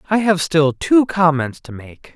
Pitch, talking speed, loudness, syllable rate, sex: 165 Hz, 195 wpm, -16 LUFS, 4.2 syllables/s, male